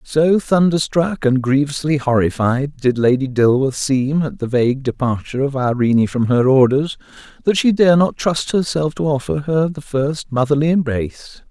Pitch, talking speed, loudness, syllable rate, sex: 140 Hz, 160 wpm, -17 LUFS, 4.8 syllables/s, male